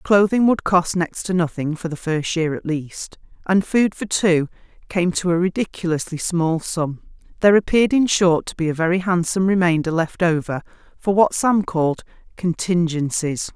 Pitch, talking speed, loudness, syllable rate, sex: 175 Hz, 170 wpm, -20 LUFS, 4.9 syllables/s, female